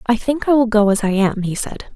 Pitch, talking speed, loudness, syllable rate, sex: 220 Hz, 305 wpm, -17 LUFS, 5.6 syllables/s, female